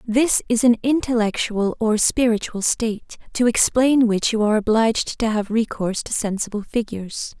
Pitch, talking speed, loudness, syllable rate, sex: 225 Hz, 155 wpm, -20 LUFS, 5.0 syllables/s, female